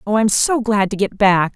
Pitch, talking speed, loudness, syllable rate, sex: 205 Hz, 310 wpm, -16 LUFS, 5.6 syllables/s, female